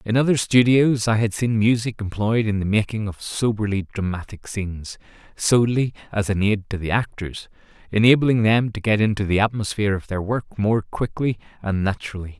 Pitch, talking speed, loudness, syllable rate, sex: 105 Hz, 175 wpm, -21 LUFS, 5.4 syllables/s, male